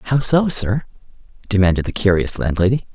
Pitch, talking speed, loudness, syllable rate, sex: 105 Hz, 140 wpm, -18 LUFS, 5.3 syllables/s, male